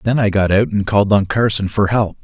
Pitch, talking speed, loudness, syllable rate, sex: 105 Hz, 270 wpm, -15 LUFS, 5.8 syllables/s, male